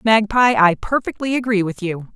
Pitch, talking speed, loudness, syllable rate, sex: 210 Hz, 165 wpm, -17 LUFS, 5.0 syllables/s, female